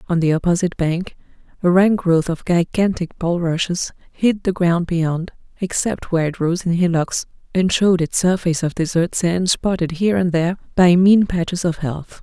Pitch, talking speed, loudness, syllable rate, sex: 175 Hz, 175 wpm, -18 LUFS, 5.0 syllables/s, female